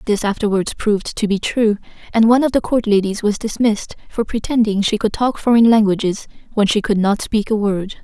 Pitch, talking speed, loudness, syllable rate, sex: 215 Hz, 210 wpm, -17 LUFS, 5.6 syllables/s, female